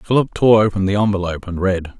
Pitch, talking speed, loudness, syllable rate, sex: 100 Hz, 210 wpm, -17 LUFS, 6.2 syllables/s, male